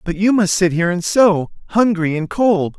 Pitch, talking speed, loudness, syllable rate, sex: 185 Hz, 215 wpm, -16 LUFS, 4.9 syllables/s, male